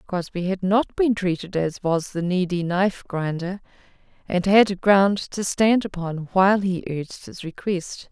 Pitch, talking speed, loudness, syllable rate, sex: 185 Hz, 165 wpm, -22 LUFS, 4.3 syllables/s, female